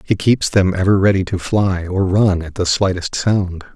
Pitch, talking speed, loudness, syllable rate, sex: 95 Hz, 210 wpm, -16 LUFS, 4.5 syllables/s, male